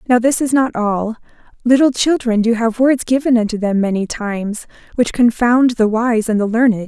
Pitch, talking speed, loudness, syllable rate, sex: 235 Hz, 190 wpm, -15 LUFS, 5.0 syllables/s, female